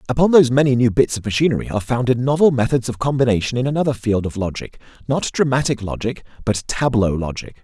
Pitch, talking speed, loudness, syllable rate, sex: 120 Hz, 190 wpm, -18 LUFS, 6.6 syllables/s, male